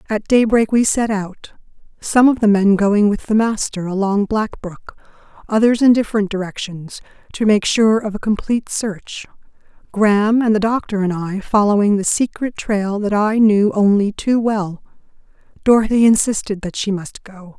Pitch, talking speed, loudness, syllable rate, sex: 210 Hz, 160 wpm, -16 LUFS, 4.7 syllables/s, female